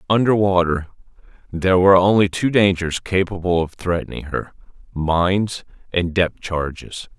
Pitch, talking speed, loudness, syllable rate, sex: 90 Hz, 115 wpm, -19 LUFS, 4.8 syllables/s, male